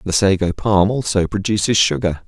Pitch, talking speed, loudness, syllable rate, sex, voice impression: 100 Hz, 160 wpm, -17 LUFS, 5.1 syllables/s, male, masculine, adult-like, slightly thick, slightly fluent, cool, intellectual